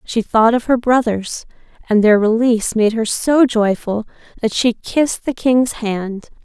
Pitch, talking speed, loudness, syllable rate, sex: 230 Hz, 170 wpm, -16 LUFS, 4.2 syllables/s, female